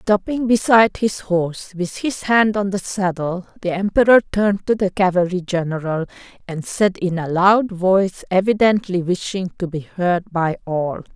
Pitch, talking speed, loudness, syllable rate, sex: 190 Hz, 160 wpm, -19 LUFS, 4.6 syllables/s, female